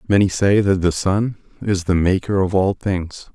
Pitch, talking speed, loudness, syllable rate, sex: 95 Hz, 195 wpm, -18 LUFS, 4.6 syllables/s, male